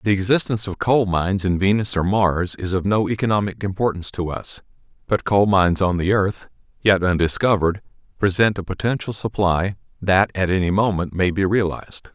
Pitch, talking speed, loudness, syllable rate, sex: 100 Hz, 175 wpm, -20 LUFS, 5.6 syllables/s, male